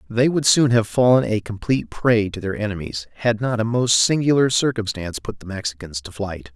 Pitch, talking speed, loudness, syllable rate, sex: 110 Hz, 200 wpm, -20 LUFS, 5.5 syllables/s, male